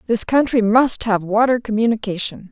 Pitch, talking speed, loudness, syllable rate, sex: 225 Hz, 145 wpm, -17 LUFS, 5.2 syllables/s, female